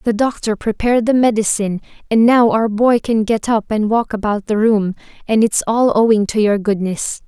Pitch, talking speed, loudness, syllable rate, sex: 220 Hz, 200 wpm, -15 LUFS, 5.1 syllables/s, female